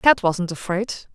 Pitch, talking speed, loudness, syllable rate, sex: 190 Hz, 155 wpm, -22 LUFS, 3.8 syllables/s, female